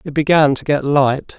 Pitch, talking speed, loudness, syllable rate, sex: 145 Hz, 215 wpm, -15 LUFS, 4.7 syllables/s, male